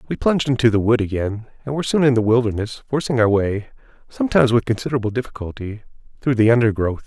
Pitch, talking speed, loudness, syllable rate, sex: 115 Hz, 185 wpm, -19 LUFS, 7.0 syllables/s, male